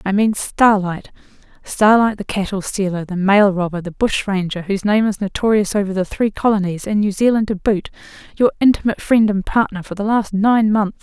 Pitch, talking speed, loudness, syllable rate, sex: 205 Hz, 185 wpm, -17 LUFS, 5.4 syllables/s, female